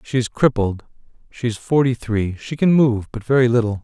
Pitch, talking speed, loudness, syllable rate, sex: 120 Hz, 205 wpm, -19 LUFS, 5.2 syllables/s, male